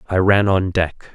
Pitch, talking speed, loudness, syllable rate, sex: 95 Hz, 210 wpm, -17 LUFS, 4.0 syllables/s, male